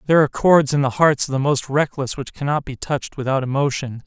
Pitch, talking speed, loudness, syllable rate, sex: 140 Hz, 235 wpm, -19 LUFS, 6.2 syllables/s, male